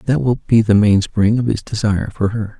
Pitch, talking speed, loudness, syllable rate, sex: 110 Hz, 255 wpm, -16 LUFS, 5.5 syllables/s, male